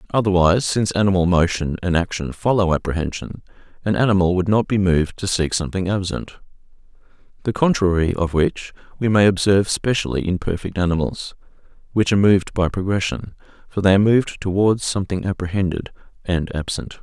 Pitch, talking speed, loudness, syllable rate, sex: 95 Hz, 150 wpm, -19 LUFS, 6.1 syllables/s, male